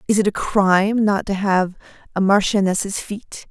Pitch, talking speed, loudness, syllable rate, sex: 200 Hz, 170 wpm, -18 LUFS, 4.4 syllables/s, female